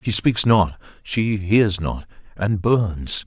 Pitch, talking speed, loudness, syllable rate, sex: 100 Hz, 130 wpm, -20 LUFS, 3.0 syllables/s, male